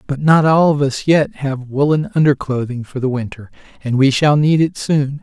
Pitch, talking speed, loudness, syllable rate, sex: 140 Hz, 205 wpm, -15 LUFS, 4.9 syllables/s, male